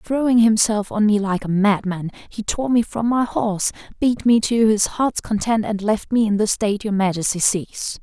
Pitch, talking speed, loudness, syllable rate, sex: 215 Hz, 210 wpm, -19 LUFS, 4.8 syllables/s, female